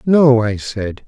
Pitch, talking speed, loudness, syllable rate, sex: 120 Hz, 165 wpm, -15 LUFS, 3.2 syllables/s, male